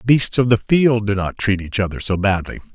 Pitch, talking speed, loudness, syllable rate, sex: 105 Hz, 260 wpm, -18 LUFS, 5.4 syllables/s, male